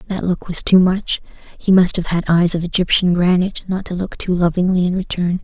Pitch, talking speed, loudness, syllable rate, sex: 180 Hz, 220 wpm, -17 LUFS, 5.5 syllables/s, female